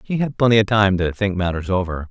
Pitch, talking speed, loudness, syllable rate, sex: 100 Hz, 255 wpm, -18 LUFS, 6.1 syllables/s, male